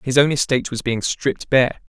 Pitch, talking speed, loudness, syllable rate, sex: 130 Hz, 215 wpm, -19 LUFS, 5.7 syllables/s, male